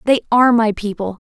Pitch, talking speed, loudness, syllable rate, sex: 225 Hz, 190 wpm, -16 LUFS, 6.3 syllables/s, female